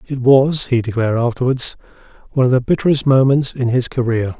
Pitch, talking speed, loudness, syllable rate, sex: 125 Hz, 175 wpm, -16 LUFS, 6.0 syllables/s, male